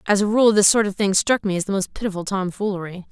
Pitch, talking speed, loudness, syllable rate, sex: 200 Hz, 270 wpm, -20 LUFS, 6.4 syllables/s, female